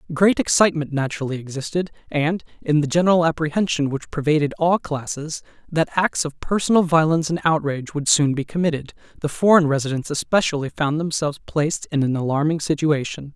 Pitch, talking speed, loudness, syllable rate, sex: 155 Hz, 155 wpm, -21 LUFS, 6.1 syllables/s, male